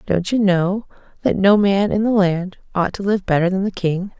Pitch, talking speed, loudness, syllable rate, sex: 195 Hz, 230 wpm, -18 LUFS, 4.8 syllables/s, female